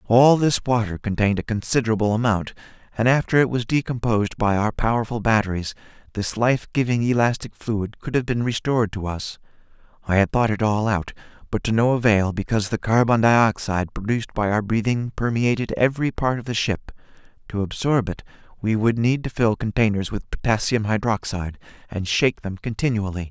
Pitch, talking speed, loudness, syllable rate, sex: 110 Hz, 175 wpm, -22 LUFS, 5.6 syllables/s, male